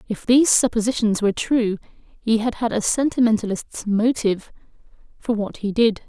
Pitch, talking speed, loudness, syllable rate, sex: 220 Hz, 150 wpm, -20 LUFS, 5.1 syllables/s, female